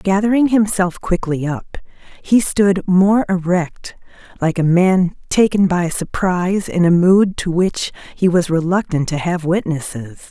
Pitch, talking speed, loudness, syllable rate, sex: 180 Hz, 145 wpm, -16 LUFS, 4.1 syllables/s, female